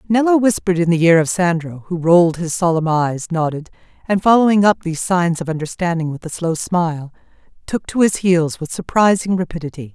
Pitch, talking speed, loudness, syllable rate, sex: 175 Hz, 185 wpm, -17 LUFS, 5.7 syllables/s, female